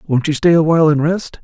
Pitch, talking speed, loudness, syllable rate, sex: 155 Hz, 250 wpm, -14 LUFS, 5.8 syllables/s, male